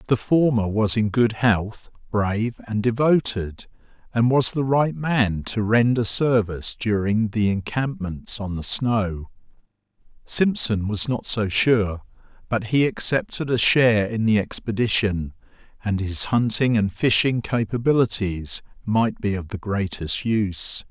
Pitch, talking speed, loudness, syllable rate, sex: 110 Hz, 140 wpm, -21 LUFS, 4.1 syllables/s, male